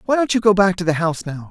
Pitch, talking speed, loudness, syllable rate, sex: 190 Hz, 360 wpm, -17 LUFS, 7.3 syllables/s, male